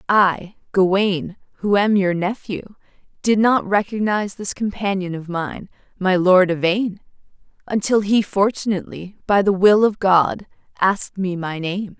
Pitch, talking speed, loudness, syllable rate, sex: 195 Hz, 140 wpm, -19 LUFS, 4.4 syllables/s, female